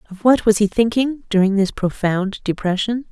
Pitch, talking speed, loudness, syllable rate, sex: 210 Hz, 175 wpm, -18 LUFS, 5.0 syllables/s, female